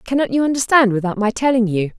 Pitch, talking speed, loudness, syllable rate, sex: 235 Hz, 210 wpm, -17 LUFS, 6.3 syllables/s, female